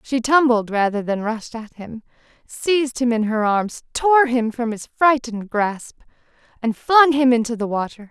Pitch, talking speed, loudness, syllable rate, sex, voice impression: 240 Hz, 180 wpm, -19 LUFS, 4.6 syllables/s, female, very feminine, slightly young, slightly adult-like, very thin, tensed, slightly weak, bright, soft, very clear, fluent, very cute, slightly cool, intellectual, refreshing, sincere, calm, very friendly, very reassuring, unique, very elegant, slightly wild, very sweet, slightly lively, very kind, slightly intense, slightly sharp, slightly modest, light